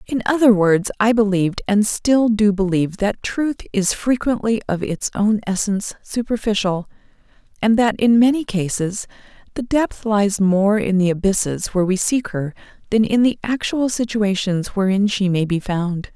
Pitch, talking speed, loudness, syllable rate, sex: 210 Hz, 165 wpm, -18 LUFS, 4.7 syllables/s, female